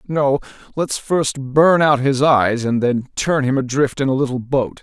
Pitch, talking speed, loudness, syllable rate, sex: 135 Hz, 200 wpm, -17 LUFS, 4.3 syllables/s, male